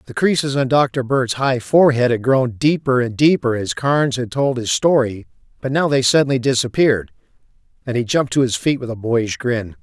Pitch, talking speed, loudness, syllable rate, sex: 125 Hz, 200 wpm, -17 LUFS, 5.4 syllables/s, male